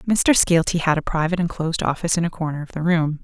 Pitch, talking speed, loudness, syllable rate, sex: 165 Hz, 240 wpm, -20 LUFS, 6.8 syllables/s, female